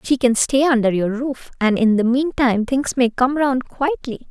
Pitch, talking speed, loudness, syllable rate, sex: 250 Hz, 225 wpm, -18 LUFS, 4.5 syllables/s, female